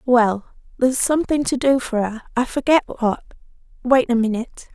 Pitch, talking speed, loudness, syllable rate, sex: 245 Hz, 165 wpm, -19 LUFS, 5.5 syllables/s, female